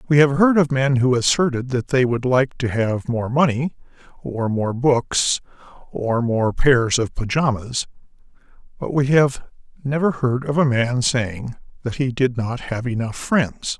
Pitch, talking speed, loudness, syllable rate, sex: 130 Hz, 170 wpm, -20 LUFS, 4.1 syllables/s, male